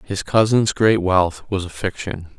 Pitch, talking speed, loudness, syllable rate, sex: 95 Hz, 175 wpm, -19 LUFS, 4.2 syllables/s, male